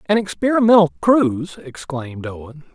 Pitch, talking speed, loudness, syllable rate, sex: 170 Hz, 110 wpm, -17 LUFS, 5.5 syllables/s, male